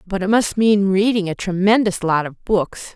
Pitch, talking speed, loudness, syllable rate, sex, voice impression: 195 Hz, 205 wpm, -18 LUFS, 4.7 syllables/s, female, feminine, middle-aged, tensed, powerful, clear, raspy, intellectual, elegant, lively, slightly strict